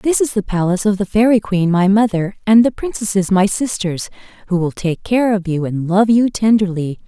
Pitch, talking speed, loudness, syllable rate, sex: 200 Hz, 210 wpm, -16 LUFS, 5.2 syllables/s, female